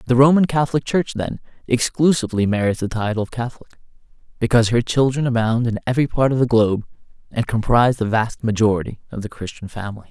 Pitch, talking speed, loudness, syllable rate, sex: 120 Hz, 180 wpm, -19 LUFS, 6.6 syllables/s, male